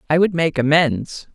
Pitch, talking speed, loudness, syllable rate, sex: 155 Hz, 180 wpm, -17 LUFS, 4.5 syllables/s, male